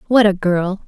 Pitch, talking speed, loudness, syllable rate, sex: 195 Hz, 205 wpm, -16 LUFS, 4.4 syllables/s, female